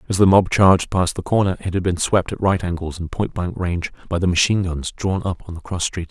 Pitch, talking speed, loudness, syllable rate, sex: 90 Hz, 275 wpm, -20 LUFS, 5.9 syllables/s, male